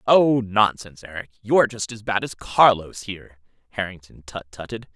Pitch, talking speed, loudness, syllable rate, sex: 105 Hz, 160 wpm, -21 LUFS, 5.3 syllables/s, male